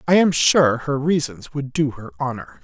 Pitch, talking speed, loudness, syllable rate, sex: 145 Hz, 205 wpm, -20 LUFS, 4.5 syllables/s, male